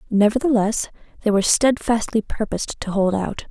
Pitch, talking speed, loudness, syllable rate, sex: 220 Hz, 135 wpm, -20 LUFS, 5.5 syllables/s, female